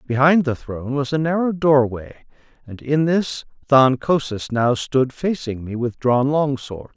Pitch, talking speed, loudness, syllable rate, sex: 135 Hz, 170 wpm, -19 LUFS, 4.3 syllables/s, male